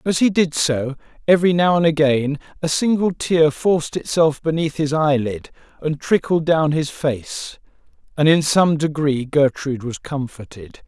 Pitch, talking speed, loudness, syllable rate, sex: 150 Hz, 155 wpm, -19 LUFS, 4.6 syllables/s, male